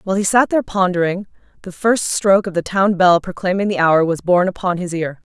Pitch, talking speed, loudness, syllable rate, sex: 185 Hz, 225 wpm, -17 LUFS, 6.1 syllables/s, female